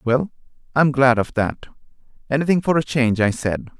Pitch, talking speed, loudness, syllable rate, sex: 130 Hz, 160 wpm, -19 LUFS, 5.5 syllables/s, male